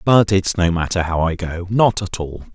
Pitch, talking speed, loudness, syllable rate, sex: 90 Hz, 210 wpm, -18 LUFS, 4.7 syllables/s, male